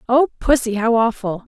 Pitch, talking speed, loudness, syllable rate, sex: 235 Hz, 155 wpm, -18 LUFS, 5.0 syllables/s, female